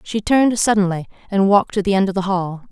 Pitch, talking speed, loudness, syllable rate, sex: 195 Hz, 245 wpm, -17 LUFS, 6.5 syllables/s, female